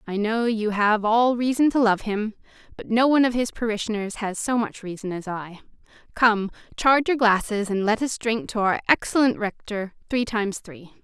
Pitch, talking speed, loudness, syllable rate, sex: 220 Hz, 190 wpm, -23 LUFS, 5.1 syllables/s, female